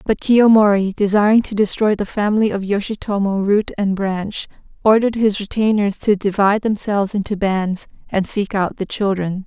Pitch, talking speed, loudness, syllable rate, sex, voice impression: 205 Hz, 160 wpm, -17 LUFS, 5.1 syllables/s, female, feminine, slightly adult-like, intellectual, calm, sweet, slightly kind